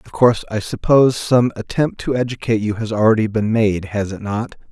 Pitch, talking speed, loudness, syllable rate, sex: 110 Hz, 205 wpm, -18 LUFS, 5.7 syllables/s, male